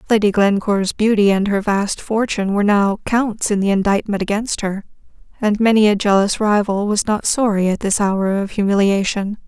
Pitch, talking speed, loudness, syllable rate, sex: 205 Hz, 175 wpm, -17 LUFS, 5.2 syllables/s, female